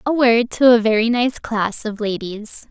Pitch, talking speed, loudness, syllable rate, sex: 230 Hz, 200 wpm, -17 LUFS, 4.3 syllables/s, female